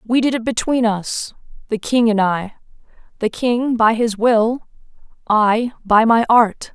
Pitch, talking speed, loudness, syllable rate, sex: 225 Hz, 150 wpm, -17 LUFS, 3.9 syllables/s, female